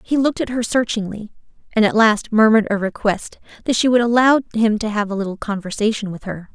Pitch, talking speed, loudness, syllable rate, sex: 220 Hz, 210 wpm, -18 LUFS, 6.0 syllables/s, female